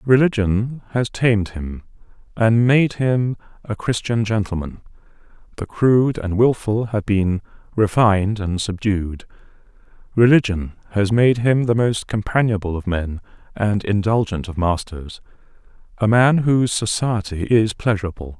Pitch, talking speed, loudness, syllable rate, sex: 105 Hz, 120 wpm, -19 LUFS, 4.6 syllables/s, male